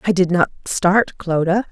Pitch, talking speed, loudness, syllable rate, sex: 185 Hz, 175 wpm, -18 LUFS, 4.3 syllables/s, female